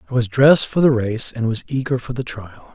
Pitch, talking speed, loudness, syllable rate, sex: 120 Hz, 260 wpm, -18 LUFS, 5.7 syllables/s, male